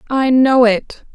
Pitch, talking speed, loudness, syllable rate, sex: 250 Hz, 155 wpm, -13 LUFS, 3.4 syllables/s, female